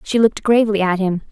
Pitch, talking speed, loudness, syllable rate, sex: 205 Hz, 230 wpm, -16 LUFS, 6.9 syllables/s, female